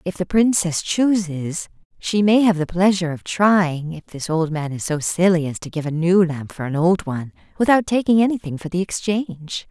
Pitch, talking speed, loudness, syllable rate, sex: 175 Hz, 210 wpm, -20 LUFS, 5.1 syllables/s, female